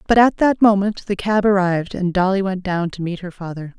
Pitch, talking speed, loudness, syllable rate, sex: 190 Hz, 240 wpm, -18 LUFS, 5.5 syllables/s, female